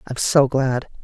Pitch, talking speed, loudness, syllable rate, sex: 130 Hz, 175 wpm, -19 LUFS, 3.9 syllables/s, female